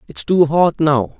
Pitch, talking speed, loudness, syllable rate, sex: 155 Hz, 200 wpm, -15 LUFS, 3.9 syllables/s, male